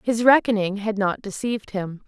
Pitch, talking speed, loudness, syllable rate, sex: 210 Hz, 175 wpm, -22 LUFS, 5.1 syllables/s, female